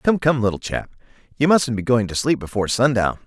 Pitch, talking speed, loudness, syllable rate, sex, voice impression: 125 Hz, 220 wpm, -20 LUFS, 6.0 syllables/s, male, masculine, adult-like, tensed, powerful, clear, fluent, slightly nasal, cool, intellectual, calm, slightly mature, friendly, reassuring, wild, lively, slightly kind